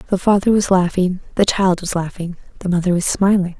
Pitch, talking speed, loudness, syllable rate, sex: 185 Hz, 200 wpm, -17 LUFS, 5.8 syllables/s, female